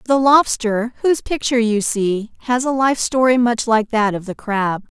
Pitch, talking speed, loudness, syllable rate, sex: 235 Hz, 190 wpm, -17 LUFS, 4.7 syllables/s, female